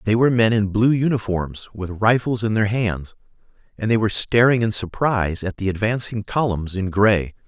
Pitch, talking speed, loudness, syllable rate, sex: 105 Hz, 185 wpm, -20 LUFS, 5.2 syllables/s, male